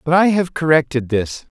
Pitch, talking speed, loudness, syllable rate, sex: 155 Hz, 190 wpm, -17 LUFS, 5.0 syllables/s, male